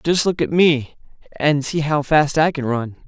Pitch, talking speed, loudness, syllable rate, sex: 150 Hz, 215 wpm, -18 LUFS, 4.3 syllables/s, male